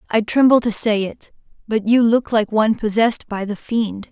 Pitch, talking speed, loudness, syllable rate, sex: 220 Hz, 205 wpm, -18 LUFS, 5.0 syllables/s, female